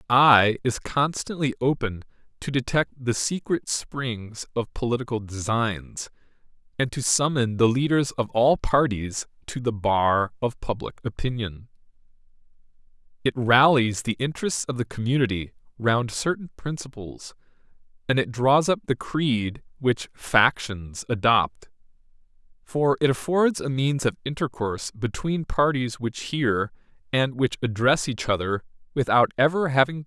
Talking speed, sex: 140 wpm, male